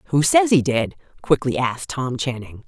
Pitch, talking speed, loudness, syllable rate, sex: 140 Hz, 180 wpm, -20 LUFS, 5.1 syllables/s, female